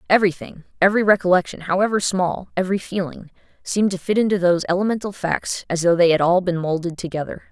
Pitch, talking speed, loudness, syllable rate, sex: 185 Hz, 175 wpm, -20 LUFS, 6.6 syllables/s, female